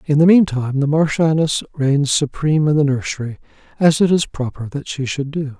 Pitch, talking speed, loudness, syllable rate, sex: 145 Hz, 180 wpm, -17 LUFS, 5.5 syllables/s, male